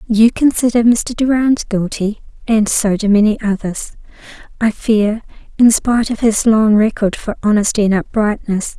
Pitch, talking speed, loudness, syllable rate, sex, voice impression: 220 Hz, 150 wpm, -14 LUFS, 4.7 syllables/s, female, very feminine, slightly young, thin, slightly tensed, slightly weak, dark, slightly hard, slightly muffled, fluent, slightly raspy, cute, intellectual, refreshing, sincere, calm, friendly, very reassuring, unique, elegant, slightly wild, sweet, slightly lively, very kind, modest, light